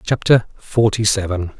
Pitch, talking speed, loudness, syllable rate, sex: 105 Hz, 115 wpm, -17 LUFS, 4.4 syllables/s, male